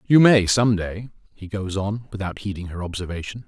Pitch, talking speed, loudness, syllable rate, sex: 100 Hz, 190 wpm, -22 LUFS, 5.3 syllables/s, male